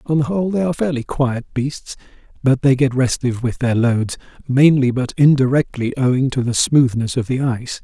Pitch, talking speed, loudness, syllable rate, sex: 130 Hz, 190 wpm, -17 LUFS, 5.4 syllables/s, male